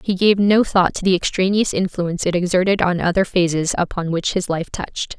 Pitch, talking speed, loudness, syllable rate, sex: 185 Hz, 210 wpm, -18 LUFS, 5.6 syllables/s, female